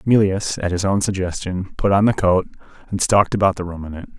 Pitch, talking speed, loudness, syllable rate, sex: 95 Hz, 230 wpm, -19 LUFS, 5.8 syllables/s, male